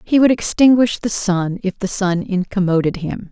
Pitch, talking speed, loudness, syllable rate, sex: 195 Hz, 180 wpm, -17 LUFS, 4.7 syllables/s, female